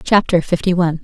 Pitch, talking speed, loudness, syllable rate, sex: 175 Hz, 175 wpm, -16 LUFS, 6.5 syllables/s, female